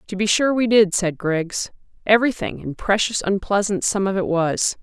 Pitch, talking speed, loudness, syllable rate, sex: 200 Hz, 185 wpm, -20 LUFS, 4.9 syllables/s, female